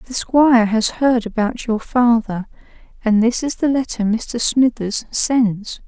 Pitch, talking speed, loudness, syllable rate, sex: 235 Hz, 155 wpm, -17 LUFS, 3.8 syllables/s, female